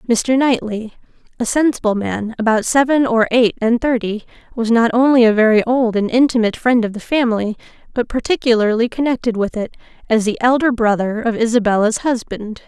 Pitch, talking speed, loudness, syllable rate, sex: 230 Hz, 165 wpm, -16 LUFS, 5.6 syllables/s, female